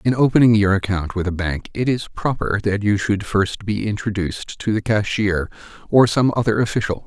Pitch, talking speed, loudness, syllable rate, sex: 105 Hz, 195 wpm, -19 LUFS, 5.3 syllables/s, male